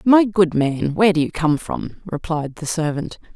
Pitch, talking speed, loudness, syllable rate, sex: 170 Hz, 195 wpm, -20 LUFS, 4.5 syllables/s, female